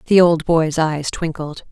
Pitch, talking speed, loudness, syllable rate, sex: 160 Hz, 175 wpm, -17 LUFS, 4.0 syllables/s, female